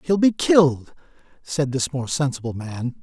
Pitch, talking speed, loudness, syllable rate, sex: 140 Hz, 160 wpm, -21 LUFS, 4.6 syllables/s, male